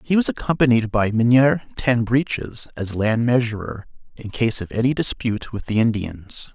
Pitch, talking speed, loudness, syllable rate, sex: 120 Hz, 165 wpm, -20 LUFS, 4.8 syllables/s, male